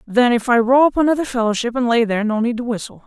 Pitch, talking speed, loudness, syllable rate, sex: 240 Hz, 295 wpm, -17 LUFS, 6.8 syllables/s, female